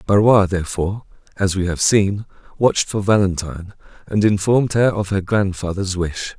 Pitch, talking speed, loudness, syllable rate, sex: 100 Hz, 150 wpm, -18 LUFS, 5.3 syllables/s, male